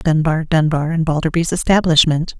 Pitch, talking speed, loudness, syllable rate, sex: 160 Hz, 125 wpm, -16 LUFS, 5.1 syllables/s, female